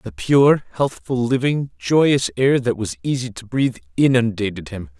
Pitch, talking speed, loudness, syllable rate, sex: 125 Hz, 155 wpm, -19 LUFS, 4.6 syllables/s, male